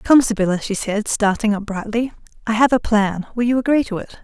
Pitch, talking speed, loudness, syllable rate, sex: 220 Hz, 215 wpm, -19 LUFS, 5.6 syllables/s, female